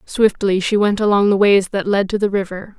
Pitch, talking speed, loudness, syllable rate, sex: 200 Hz, 235 wpm, -16 LUFS, 5.2 syllables/s, female